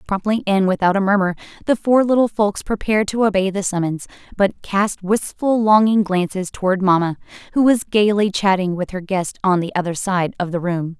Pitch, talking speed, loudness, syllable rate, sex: 195 Hz, 190 wpm, -18 LUFS, 5.3 syllables/s, female